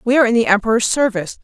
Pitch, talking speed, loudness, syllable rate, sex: 225 Hz, 250 wpm, -15 LUFS, 8.5 syllables/s, female